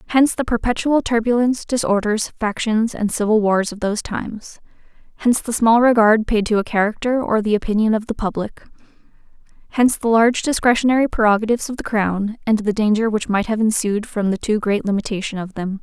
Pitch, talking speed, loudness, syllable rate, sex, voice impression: 220 Hz, 180 wpm, -18 LUFS, 6.0 syllables/s, female, feminine, adult-like, slightly cute, slightly sincere, friendly